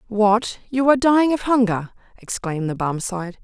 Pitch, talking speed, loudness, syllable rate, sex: 215 Hz, 155 wpm, -20 LUFS, 5.9 syllables/s, female